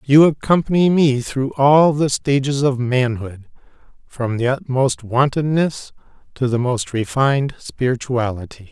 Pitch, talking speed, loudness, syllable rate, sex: 135 Hz, 125 wpm, -18 LUFS, 4.2 syllables/s, male